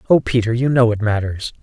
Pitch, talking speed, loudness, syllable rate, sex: 115 Hz, 220 wpm, -17 LUFS, 5.9 syllables/s, male